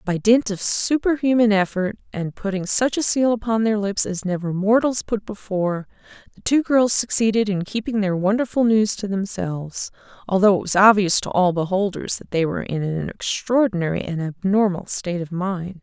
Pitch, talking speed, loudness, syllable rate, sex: 200 Hz, 180 wpm, -20 LUFS, 5.2 syllables/s, female